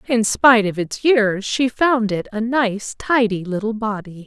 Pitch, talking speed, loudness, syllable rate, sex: 220 Hz, 185 wpm, -18 LUFS, 4.2 syllables/s, female